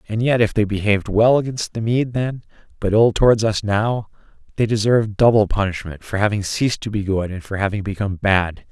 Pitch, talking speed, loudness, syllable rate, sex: 105 Hz, 205 wpm, -19 LUFS, 5.8 syllables/s, male